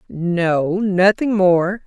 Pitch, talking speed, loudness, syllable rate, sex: 185 Hz, 95 wpm, -17 LUFS, 2.4 syllables/s, female